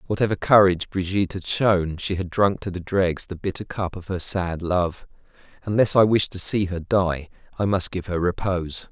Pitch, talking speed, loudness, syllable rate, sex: 95 Hz, 200 wpm, -22 LUFS, 5.1 syllables/s, male